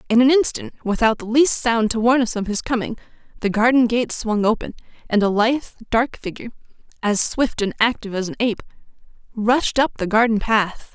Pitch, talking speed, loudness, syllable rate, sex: 230 Hz, 190 wpm, -19 LUFS, 5.8 syllables/s, female